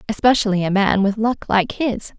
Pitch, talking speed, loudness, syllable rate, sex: 210 Hz, 190 wpm, -18 LUFS, 5.0 syllables/s, female